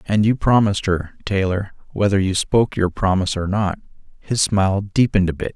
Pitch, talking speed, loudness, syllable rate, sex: 100 Hz, 185 wpm, -19 LUFS, 5.7 syllables/s, male